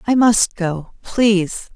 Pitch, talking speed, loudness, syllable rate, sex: 205 Hz, 135 wpm, -17 LUFS, 3.6 syllables/s, female